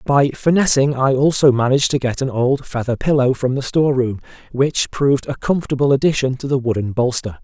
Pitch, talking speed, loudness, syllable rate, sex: 135 Hz, 195 wpm, -17 LUFS, 5.8 syllables/s, male